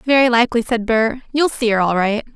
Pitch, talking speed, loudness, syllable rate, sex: 230 Hz, 230 wpm, -17 LUFS, 5.9 syllables/s, female